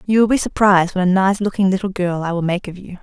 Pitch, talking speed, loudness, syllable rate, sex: 190 Hz, 295 wpm, -17 LUFS, 6.5 syllables/s, female